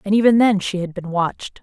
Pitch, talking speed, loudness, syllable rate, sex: 195 Hz, 260 wpm, -18 LUFS, 5.9 syllables/s, female